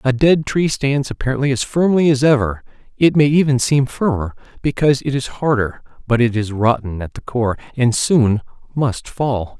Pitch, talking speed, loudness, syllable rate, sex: 130 Hz, 170 wpm, -17 LUFS, 4.9 syllables/s, male